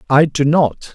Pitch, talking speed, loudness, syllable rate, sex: 145 Hz, 190 wpm, -15 LUFS, 4.0 syllables/s, male